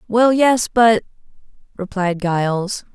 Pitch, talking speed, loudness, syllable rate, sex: 205 Hz, 80 wpm, -17 LUFS, 3.6 syllables/s, female